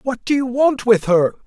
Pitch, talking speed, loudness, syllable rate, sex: 240 Hz, 245 wpm, -17 LUFS, 4.7 syllables/s, male